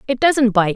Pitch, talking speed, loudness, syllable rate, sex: 245 Hz, 240 wpm, -16 LUFS, 4.7 syllables/s, female